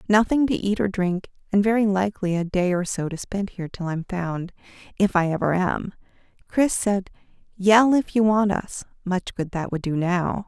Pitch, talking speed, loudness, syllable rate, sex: 190 Hz, 200 wpm, -23 LUFS, 4.9 syllables/s, female